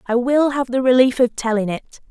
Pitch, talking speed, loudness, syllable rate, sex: 245 Hz, 230 wpm, -17 LUFS, 5.2 syllables/s, female